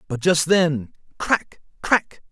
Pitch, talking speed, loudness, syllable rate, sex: 160 Hz, 105 wpm, -20 LUFS, 3.1 syllables/s, male